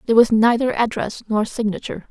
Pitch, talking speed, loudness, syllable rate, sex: 225 Hz, 170 wpm, -19 LUFS, 6.3 syllables/s, female